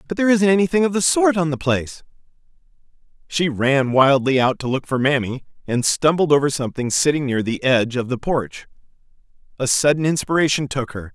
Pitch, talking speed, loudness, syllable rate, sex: 140 Hz, 185 wpm, -19 LUFS, 5.8 syllables/s, male